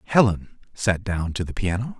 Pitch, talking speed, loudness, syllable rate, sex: 95 Hz, 180 wpm, -24 LUFS, 4.8 syllables/s, male